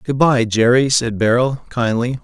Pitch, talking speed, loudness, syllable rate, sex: 125 Hz, 160 wpm, -16 LUFS, 4.4 syllables/s, male